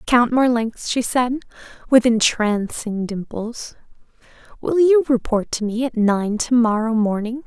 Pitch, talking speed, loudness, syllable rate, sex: 235 Hz, 135 wpm, -19 LUFS, 4.0 syllables/s, female